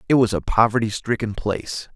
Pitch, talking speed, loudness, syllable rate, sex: 110 Hz, 185 wpm, -21 LUFS, 5.8 syllables/s, male